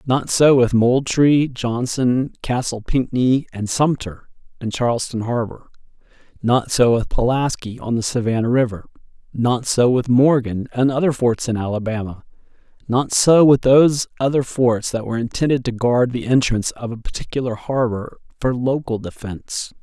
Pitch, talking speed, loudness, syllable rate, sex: 125 Hz, 150 wpm, -18 LUFS, 4.8 syllables/s, male